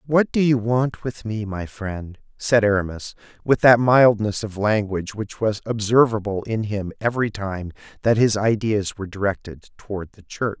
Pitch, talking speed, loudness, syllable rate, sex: 105 Hz, 170 wpm, -21 LUFS, 4.8 syllables/s, male